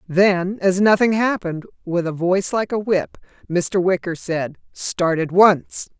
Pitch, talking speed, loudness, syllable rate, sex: 185 Hz, 160 wpm, -19 LUFS, 4.1 syllables/s, female